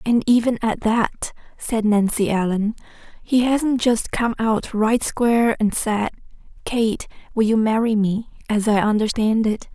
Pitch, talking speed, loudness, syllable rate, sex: 220 Hz, 155 wpm, -20 LUFS, 4.1 syllables/s, female